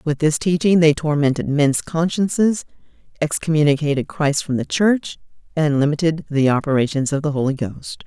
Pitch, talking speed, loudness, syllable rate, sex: 150 Hz, 150 wpm, -19 LUFS, 5.1 syllables/s, female